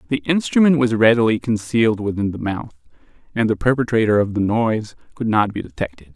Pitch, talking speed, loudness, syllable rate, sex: 110 Hz, 175 wpm, -19 LUFS, 6.0 syllables/s, male